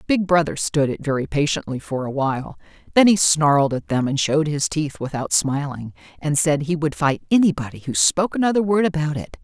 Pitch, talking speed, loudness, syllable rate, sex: 150 Hz, 205 wpm, -20 LUFS, 5.6 syllables/s, female